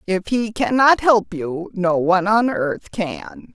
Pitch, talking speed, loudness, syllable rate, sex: 200 Hz, 170 wpm, -18 LUFS, 3.6 syllables/s, female